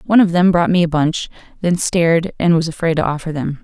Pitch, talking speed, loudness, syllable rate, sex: 165 Hz, 250 wpm, -16 LUFS, 6.1 syllables/s, female